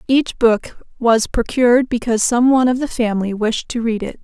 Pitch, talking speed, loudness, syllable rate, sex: 235 Hz, 200 wpm, -17 LUFS, 5.4 syllables/s, female